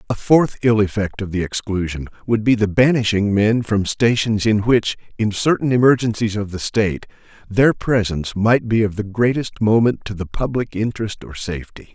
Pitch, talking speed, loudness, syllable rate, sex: 110 Hz, 180 wpm, -18 LUFS, 5.2 syllables/s, male